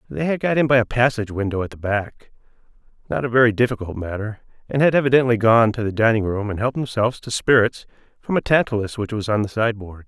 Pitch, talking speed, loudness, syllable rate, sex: 115 Hz, 210 wpm, -20 LUFS, 6.6 syllables/s, male